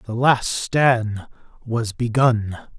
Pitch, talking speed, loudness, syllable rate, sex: 115 Hz, 110 wpm, -20 LUFS, 2.9 syllables/s, male